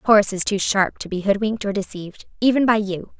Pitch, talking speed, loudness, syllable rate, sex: 205 Hz, 225 wpm, -20 LUFS, 6.3 syllables/s, female